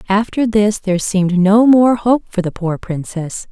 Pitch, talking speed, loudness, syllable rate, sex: 200 Hz, 190 wpm, -15 LUFS, 4.6 syllables/s, female